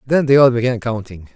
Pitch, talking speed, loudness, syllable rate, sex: 120 Hz, 220 wpm, -15 LUFS, 5.7 syllables/s, male